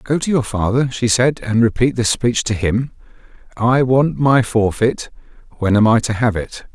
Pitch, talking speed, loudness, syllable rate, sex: 120 Hz, 195 wpm, -16 LUFS, 4.5 syllables/s, male